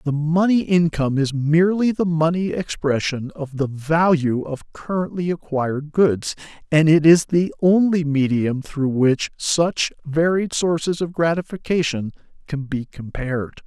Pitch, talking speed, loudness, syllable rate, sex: 155 Hz, 135 wpm, -20 LUFS, 4.4 syllables/s, male